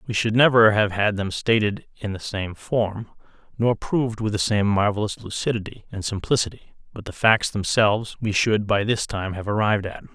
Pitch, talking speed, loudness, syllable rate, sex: 105 Hz, 190 wpm, -22 LUFS, 5.3 syllables/s, male